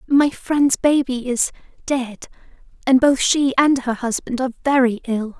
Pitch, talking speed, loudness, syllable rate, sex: 260 Hz, 155 wpm, -18 LUFS, 4.4 syllables/s, female